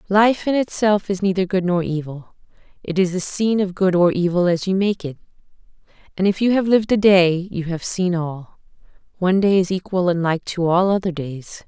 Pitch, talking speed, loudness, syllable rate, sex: 185 Hz, 210 wpm, -19 LUFS, 5.3 syllables/s, female